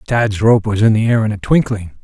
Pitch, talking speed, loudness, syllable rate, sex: 110 Hz, 265 wpm, -14 LUFS, 5.5 syllables/s, male